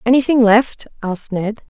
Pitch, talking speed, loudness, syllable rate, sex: 225 Hz, 135 wpm, -16 LUFS, 5.0 syllables/s, female